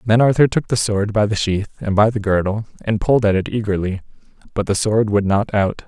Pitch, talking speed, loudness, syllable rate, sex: 105 Hz, 235 wpm, -18 LUFS, 5.7 syllables/s, male